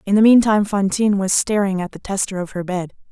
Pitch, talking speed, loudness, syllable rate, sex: 200 Hz, 230 wpm, -18 LUFS, 6.3 syllables/s, female